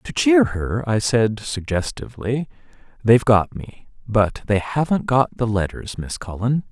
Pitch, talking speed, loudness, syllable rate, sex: 120 Hz, 150 wpm, -20 LUFS, 4.4 syllables/s, male